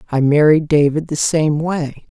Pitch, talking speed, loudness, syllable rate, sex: 150 Hz, 165 wpm, -15 LUFS, 4.3 syllables/s, female